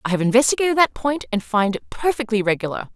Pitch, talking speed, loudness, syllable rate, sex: 235 Hz, 205 wpm, -20 LUFS, 6.5 syllables/s, female